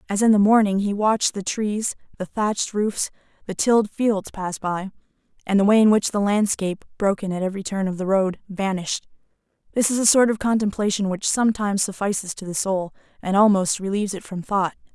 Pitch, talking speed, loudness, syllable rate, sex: 200 Hz, 195 wpm, -21 LUFS, 5.8 syllables/s, female